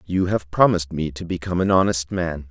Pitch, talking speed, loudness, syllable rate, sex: 85 Hz, 215 wpm, -21 LUFS, 5.9 syllables/s, male